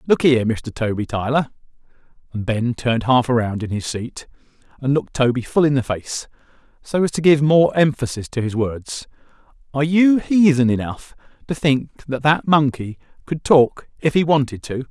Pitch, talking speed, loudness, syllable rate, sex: 135 Hz, 170 wpm, -19 LUFS, 5.1 syllables/s, male